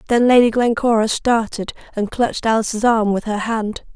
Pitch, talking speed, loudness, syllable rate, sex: 225 Hz, 165 wpm, -18 LUFS, 5.2 syllables/s, female